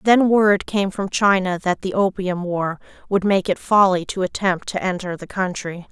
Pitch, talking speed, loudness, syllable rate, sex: 190 Hz, 195 wpm, -20 LUFS, 4.5 syllables/s, female